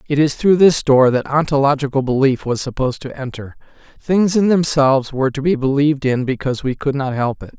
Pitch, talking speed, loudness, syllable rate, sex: 140 Hz, 205 wpm, -16 LUFS, 5.8 syllables/s, male